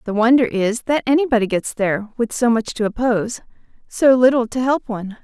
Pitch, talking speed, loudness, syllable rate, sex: 235 Hz, 195 wpm, -18 LUFS, 5.7 syllables/s, female